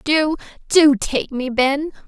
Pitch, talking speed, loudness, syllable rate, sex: 285 Hz, 145 wpm, -18 LUFS, 3.3 syllables/s, female